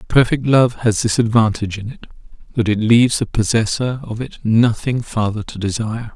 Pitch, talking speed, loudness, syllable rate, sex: 115 Hz, 175 wpm, -17 LUFS, 5.4 syllables/s, male